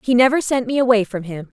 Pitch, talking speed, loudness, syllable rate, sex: 235 Hz, 265 wpm, -17 LUFS, 6.3 syllables/s, female